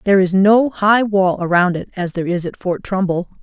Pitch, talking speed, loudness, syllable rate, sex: 190 Hz, 230 wpm, -16 LUFS, 5.4 syllables/s, female